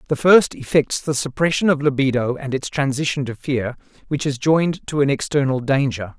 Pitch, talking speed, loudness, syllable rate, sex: 140 Hz, 185 wpm, -19 LUFS, 5.3 syllables/s, male